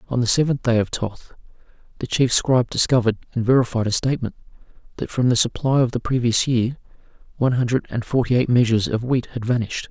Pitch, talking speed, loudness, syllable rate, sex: 120 Hz, 195 wpm, -20 LUFS, 6.5 syllables/s, male